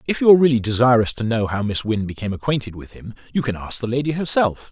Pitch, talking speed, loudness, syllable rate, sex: 120 Hz, 255 wpm, -19 LUFS, 6.8 syllables/s, male